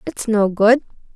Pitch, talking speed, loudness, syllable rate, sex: 225 Hz, 155 wpm, -17 LUFS, 4.1 syllables/s, female